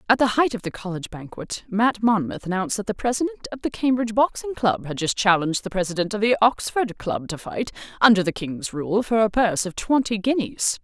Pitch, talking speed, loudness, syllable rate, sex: 215 Hz, 215 wpm, -22 LUFS, 5.8 syllables/s, female